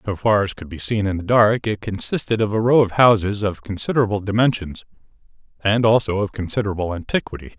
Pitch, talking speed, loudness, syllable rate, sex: 105 Hz, 180 wpm, -19 LUFS, 6.2 syllables/s, male